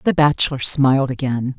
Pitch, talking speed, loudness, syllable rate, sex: 130 Hz, 150 wpm, -16 LUFS, 5.4 syllables/s, female